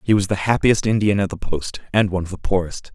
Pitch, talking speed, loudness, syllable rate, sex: 95 Hz, 265 wpm, -20 LUFS, 6.2 syllables/s, male